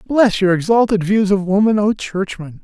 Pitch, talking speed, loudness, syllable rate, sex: 200 Hz, 180 wpm, -16 LUFS, 4.9 syllables/s, male